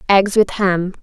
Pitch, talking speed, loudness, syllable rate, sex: 190 Hz, 175 wpm, -16 LUFS, 3.9 syllables/s, female